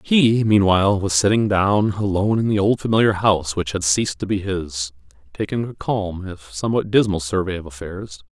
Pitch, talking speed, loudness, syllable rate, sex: 100 Hz, 190 wpm, -19 LUFS, 5.3 syllables/s, male